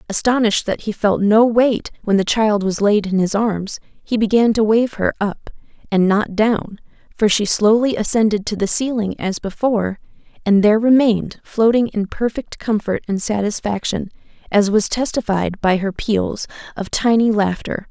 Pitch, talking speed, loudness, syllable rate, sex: 215 Hz, 165 wpm, -17 LUFS, 4.7 syllables/s, female